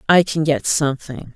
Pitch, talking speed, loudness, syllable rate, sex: 140 Hz, 175 wpm, -18 LUFS, 5.1 syllables/s, female